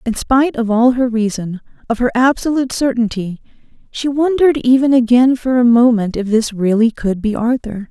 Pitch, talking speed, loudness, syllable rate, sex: 240 Hz, 175 wpm, -14 LUFS, 5.2 syllables/s, female